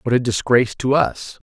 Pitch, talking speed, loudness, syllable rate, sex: 120 Hz, 205 wpm, -18 LUFS, 5.3 syllables/s, male